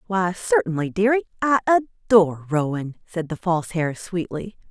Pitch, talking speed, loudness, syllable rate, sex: 185 Hz, 140 wpm, -22 LUFS, 5.6 syllables/s, female